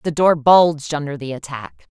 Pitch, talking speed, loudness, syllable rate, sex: 150 Hz, 185 wpm, -16 LUFS, 4.9 syllables/s, female